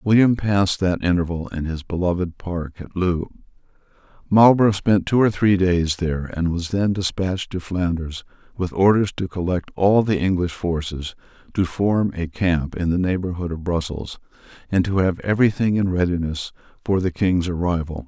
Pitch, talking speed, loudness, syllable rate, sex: 90 Hz, 170 wpm, -21 LUFS, 4.9 syllables/s, male